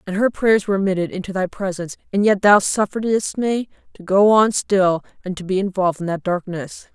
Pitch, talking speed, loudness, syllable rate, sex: 190 Hz, 205 wpm, -19 LUFS, 5.7 syllables/s, female